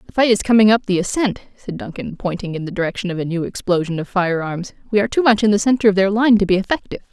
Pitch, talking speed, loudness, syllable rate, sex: 195 Hz, 270 wpm, -18 LUFS, 7.1 syllables/s, female